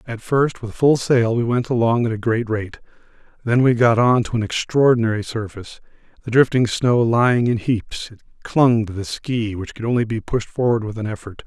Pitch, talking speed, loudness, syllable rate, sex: 115 Hz, 210 wpm, -19 LUFS, 5.2 syllables/s, male